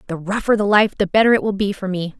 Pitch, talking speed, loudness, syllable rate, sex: 200 Hz, 300 wpm, -17 LUFS, 6.7 syllables/s, female